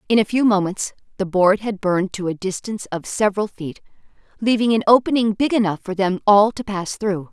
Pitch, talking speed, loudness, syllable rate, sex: 200 Hz, 205 wpm, -19 LUFS, 5.7 syllables/s, female